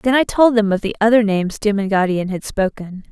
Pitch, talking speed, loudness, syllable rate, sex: 210 Hz, 250 wpm, -17 LUFS, 5.4 syllables/s, female